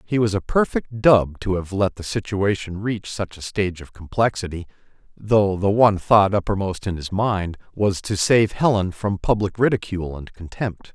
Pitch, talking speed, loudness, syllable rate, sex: 100 Hz, 180 wpm, -21 LUFS, 4.8 syllables/s, male